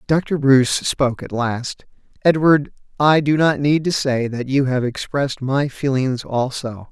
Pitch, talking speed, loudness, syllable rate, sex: 135 Hz, 165 wpm, -18 LUFS, 4.2 syllables/s, male